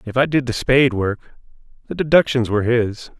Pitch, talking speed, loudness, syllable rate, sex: 120 Hz, 190 wpm, -18 LUFS, 5.6 syllables/s, male